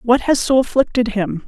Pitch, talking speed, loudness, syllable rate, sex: 235 Hz, 205 wpm, -17 LUFS, 4.9 syllables/s, female